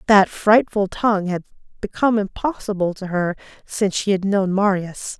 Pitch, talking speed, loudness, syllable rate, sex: 200 Hz, 150 wpm, -20 LUFS, 5.0 syllables/s, female